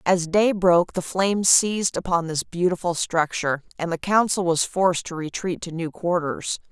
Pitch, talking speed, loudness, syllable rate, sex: 175 Hz, 180 wpm, -22 LUFS, 5.0 syllables/s, female